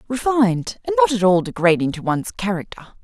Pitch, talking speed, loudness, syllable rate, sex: 195 Hz, 180 wpm, -19 LUFS, 6.6 syllables/s, female